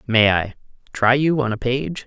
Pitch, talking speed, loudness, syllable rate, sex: 125 Hz, 205 wpm, -19 LUFS, 4.5 syllables/s, male